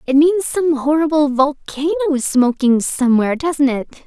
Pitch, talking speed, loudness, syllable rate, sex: 285 Hz, 135 wpm, -16 LUFS, 4.6 syllables/s, female